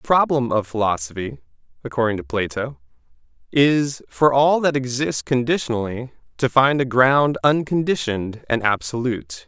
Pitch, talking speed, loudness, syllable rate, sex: 125 Hz, 125 wpm, -20 LUFS, 4.9 syllables/s, male